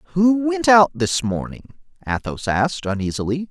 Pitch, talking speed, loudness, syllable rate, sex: 155 Hz, 135 wpm, -19 LUFS, 4.9 syllables/s, male